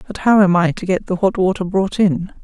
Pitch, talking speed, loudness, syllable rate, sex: 190 Hz, 270 wpm, -16 LUFS, 5.4 syllables/s, female